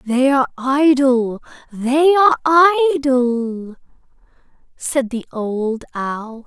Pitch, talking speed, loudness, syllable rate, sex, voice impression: 265 Hz, 95 wpm, -16 LUFS, 3.3 syllables/s, female, gender-neutral, very young, tensed, powerful, bright, soft, very halting, cute, friendly, unique